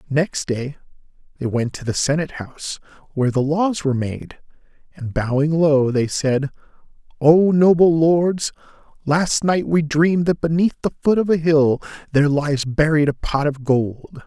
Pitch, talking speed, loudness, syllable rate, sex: 150 Hz, 165 wpm, -19 LUFS, 4.6 syllables/s, male